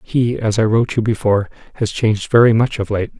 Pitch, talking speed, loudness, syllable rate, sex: 110 Hz, 225 wpm, -16 LUFS, 6.2 syllables/s, male